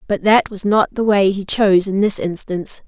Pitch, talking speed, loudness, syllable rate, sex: 200 Hz, 230 wpm, -16 LUFS, 5.2 syllables/s, female